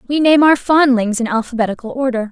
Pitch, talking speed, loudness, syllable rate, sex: 255 Hz, 180 wpm, -14 LUFS, 6.1 syllables/s, female